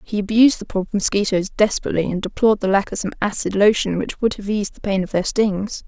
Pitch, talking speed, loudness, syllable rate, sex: 200 Hz, 235 wpm, -19 LUFS, 6.4 syllables/s, female